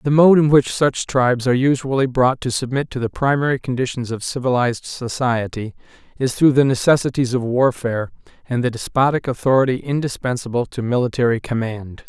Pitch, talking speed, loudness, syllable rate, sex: 125 Hz, 160 wpm, -18 LUFS, 5.7 syllables/s, male